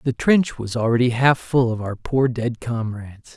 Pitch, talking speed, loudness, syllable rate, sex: 120 Hz, 195 wpm, -20 LUFS, 4.6 syllables/s, male